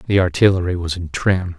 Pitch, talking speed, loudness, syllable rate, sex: 90 Hz, 190 wpm, -18 LUFS, 5.7 syllables/s, male